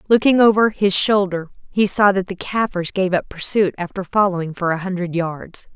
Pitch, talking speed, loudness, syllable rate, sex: 190 Hz, 190 wpm, -18 LUFS, 5.1 syllables/s, female